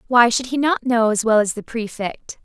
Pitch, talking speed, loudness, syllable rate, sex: 235 Hz, 245 wpm, -19 LUFS, 5.1 syllables/s, female